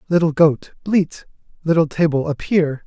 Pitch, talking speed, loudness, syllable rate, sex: 160 Hz, 125 wpm, -18 LUFS, 4.6 syllables/s, male